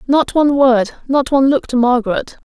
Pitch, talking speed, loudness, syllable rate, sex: 265 Hz, 195 wpm, -14 LUFS, 5.5 syllables/s, female